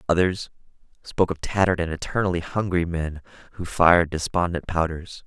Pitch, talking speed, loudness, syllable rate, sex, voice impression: 85 Hz, 135 wpm, -23 LUFS, 5.7 syllables/s, male, very masculine, very adult-like, thick, cool, slightly intellectual, calm, slightly elegant